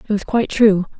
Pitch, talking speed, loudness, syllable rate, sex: 205 Hz, 240 wpm, -16 LUFS, 6.4 syllables/s, female